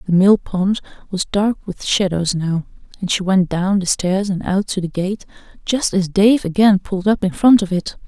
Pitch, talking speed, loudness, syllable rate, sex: 190 Hz, 210 wpm, -17 LUFS, 4.7 syllables/s, female